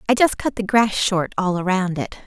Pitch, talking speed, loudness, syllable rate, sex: 200 Hz, 240 wpm, -20 LUFS, 5.0 syllables/s, female